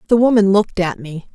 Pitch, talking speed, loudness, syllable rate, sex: 195 Hz, 225 wpm, -15 LUFS, 6.4 syllables/s, female